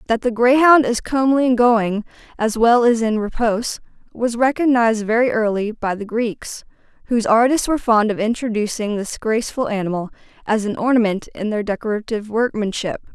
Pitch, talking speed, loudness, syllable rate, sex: 225 Hz, 160 wpm, -18 LUFS, 5.5 syllables/s, female